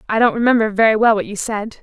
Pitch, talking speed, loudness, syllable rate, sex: 220 Hz, 265 wpm, -16 LUFS, 6.7 syllables/s, female